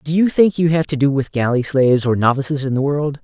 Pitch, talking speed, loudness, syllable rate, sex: 145 Hz, 280 wpm, -17 LUFS, 6.1 syllables/s, male